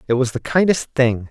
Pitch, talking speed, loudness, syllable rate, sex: 135 Hz, 230 wpm, -18 LUFS, 5.2 syllables/s, male